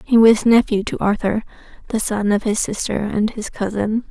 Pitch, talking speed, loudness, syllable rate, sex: 215 Hz, 190 wpm, -18 LUFS, 4.9 syllables/s, female